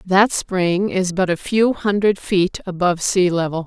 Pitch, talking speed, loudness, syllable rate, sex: 185 Hz, 180 wpm, -18 LUFS, 4.3 syllables/s, female